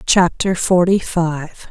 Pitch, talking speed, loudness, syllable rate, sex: 175 Hz, 105 wpm, -16 LUFS, 3.2 syllables/s, female